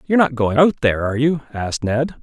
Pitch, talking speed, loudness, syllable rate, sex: 130 Hz, 245 wpm, -18 LUFS, 7.0 syllables/s, male